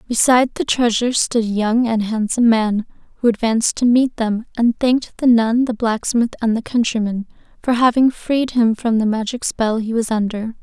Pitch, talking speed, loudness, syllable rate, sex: 230 Hz, 190 wpm, -17 LUFS, 5.1 syllables/s, female